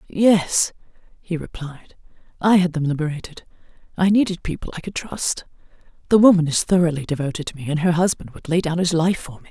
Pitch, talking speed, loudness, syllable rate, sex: 170 Hz, 190 wpm, -20 LUFS, 5.8 syllables/s, female